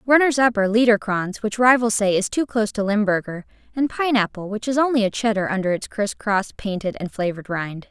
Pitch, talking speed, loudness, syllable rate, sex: 215 Hz, 195 wpm, -21 LUFS, 5.9 syllables/s, female